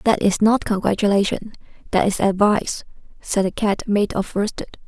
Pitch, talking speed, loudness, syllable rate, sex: 205 Hz, 160 wpm, -20 LUFS, 5.1 syllables/s, female